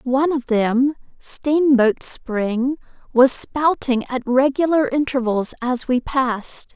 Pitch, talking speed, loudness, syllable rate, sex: 260 Hz, 115 wpm, -19 LUFS, 3.5 syllables/s, female